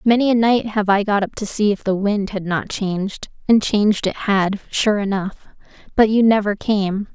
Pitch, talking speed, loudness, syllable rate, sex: 205 Hz, 210 wpm, -18 LUFS, 4.8 syllables/s, female